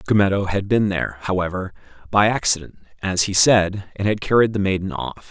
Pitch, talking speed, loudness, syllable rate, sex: 95 Hz, 180 wpm, -20 LUFS, 5.7 syllables/s, male